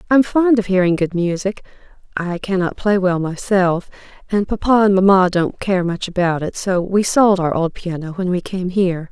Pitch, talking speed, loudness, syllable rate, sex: 190 Hz, 205 wpm, -17 LUFS, 5.1 syllables/s, female